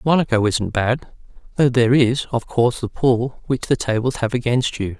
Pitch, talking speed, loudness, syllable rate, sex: 120 Hz, 180 wpm, -19 LUFS, 5.0 syllables/s, male